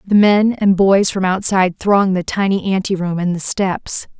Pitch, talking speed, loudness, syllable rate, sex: 190 Hz, 185 wpm, -16 LUFS, 4.7 syllables/s, female